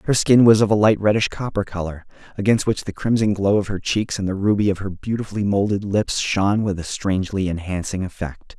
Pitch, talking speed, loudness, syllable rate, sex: 100 Hz, 215 wpm, -20 LUFS, 5.8 syllables/s, male